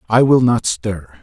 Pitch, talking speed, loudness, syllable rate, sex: 110 Hz, 195 wpm, -15 LUFS, 4.1 syllables/s, male